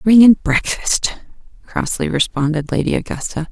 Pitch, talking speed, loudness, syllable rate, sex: 170 Hz, 120 wpm, -17 LUFS, 4.6 syllables/s, female